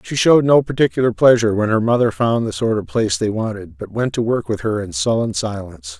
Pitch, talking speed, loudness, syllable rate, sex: 115 Hz, 240 wpm, -17 LUFS, 6.1 syllables/s, male